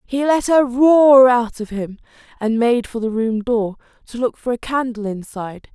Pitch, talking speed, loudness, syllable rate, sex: 240 Hz, 200 wpm, -17 LUFS, 4.5 syllables/s, female